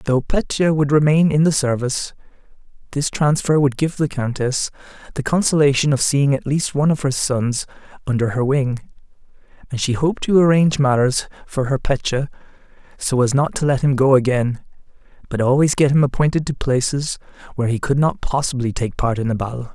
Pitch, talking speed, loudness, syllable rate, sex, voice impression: 135 Hz, 180 wpm, -18 LUFS, 5.6 syllables/s, male, slightly masculine, slightly gender-neutral, slightly thin, slightly muffled, slightly raspy, slightly intellectual, kind, slightly modest